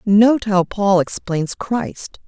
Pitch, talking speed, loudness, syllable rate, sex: 200 Hz, 130 wpm, -18 LUFS, 2.8 syllables/s, female